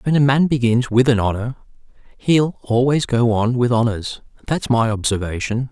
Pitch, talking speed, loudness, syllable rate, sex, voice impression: 120 Hz, 170 wpm, -18 LUFS, 4.9 syllables/s, male, masculine, slightly young, adult-like, slightly thick, tensed, slightly weak, bright, soft, very clear, very fluent, slightly cool, very intellectual, slightly refreshing, sincere, calm, slightly mature, friendly, reassuring, elegant, slightly sweet, lively, kind